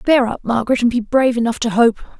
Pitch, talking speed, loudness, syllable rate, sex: 240 Hz, 245 wpm, -16 LUFS, 6.7 syllables/s, female